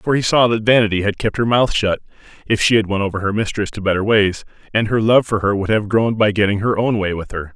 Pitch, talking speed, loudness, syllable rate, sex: 105 Hz, 280 wpm, -17 LUFS, 6.1 syllables/s, male